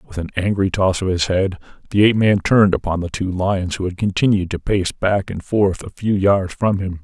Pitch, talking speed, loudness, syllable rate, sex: 95 Hz, 240 wpm, -18 LUFS, 5.2 syllables/s, male